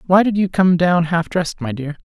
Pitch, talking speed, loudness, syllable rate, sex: 175 Hz, 260 wpm, -17 LUFS, 5.4 syllables/s, male